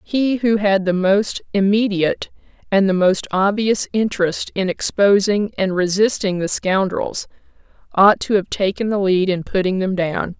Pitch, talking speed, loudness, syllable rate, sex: 195 Hz, 155 wpm, -18 LUFS, 4.4 syllables/s, female